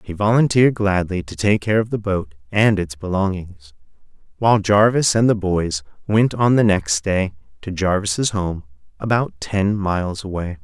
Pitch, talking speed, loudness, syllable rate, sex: 100 Hz, 165 wpm, -19 LUFS, 4.6 syllables/s, male